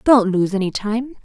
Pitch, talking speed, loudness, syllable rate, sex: 215 Hz, 195 wpm, -18 LUFS, 4.7 syllables/s, female